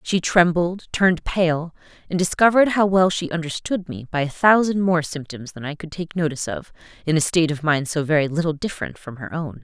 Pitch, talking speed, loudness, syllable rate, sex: 165 Hz, 210 wpm, -21 LUFS, 5.7 syllables/s, female